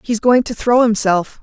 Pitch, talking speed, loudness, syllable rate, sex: 225 Hz, 210 wpm, -15 LUFS, 4.5 syllables/s, female